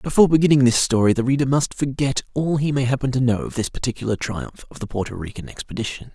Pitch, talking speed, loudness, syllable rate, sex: 130 Hz, 225 wpm, -20 LUFS, 6.6 syllables/s, male